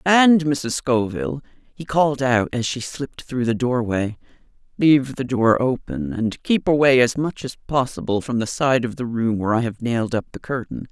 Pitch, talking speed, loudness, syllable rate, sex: 130 Hz, 200 wpm, -20 LUFS, 5.1 syllables/s, female